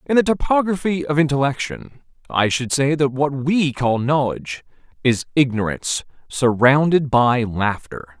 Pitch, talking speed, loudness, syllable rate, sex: 135 Hz, 130 wpm, -19 LUFS, 4.5 syllables/s, male